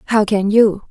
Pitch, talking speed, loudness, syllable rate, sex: 210 Hz, 200 wpm, -14 LUFS, 4.8 syllables/s, female